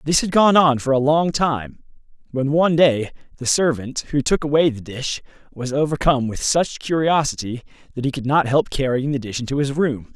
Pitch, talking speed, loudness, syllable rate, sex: 140 Hz, 200 wpm, -19 LUFS, 5.2 syllables/s, male